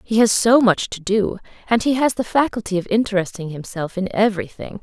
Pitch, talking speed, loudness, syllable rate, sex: 205 Hz, 200 wpm, -19 LUFS, 5.7 syllables/s, female